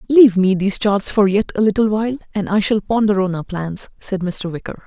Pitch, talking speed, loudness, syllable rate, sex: 200 Hz, 235 wpm, -17 LUFS, 5.7 syllables/s, female